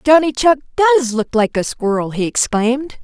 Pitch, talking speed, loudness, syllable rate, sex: 255 Hz, 180 wpm, -16 LUFS, 4.8 syllables/s, female